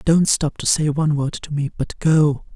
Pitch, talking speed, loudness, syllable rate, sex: 150 Hz, 235 wpm, -19 LUFS, 4.7 syllables/s, male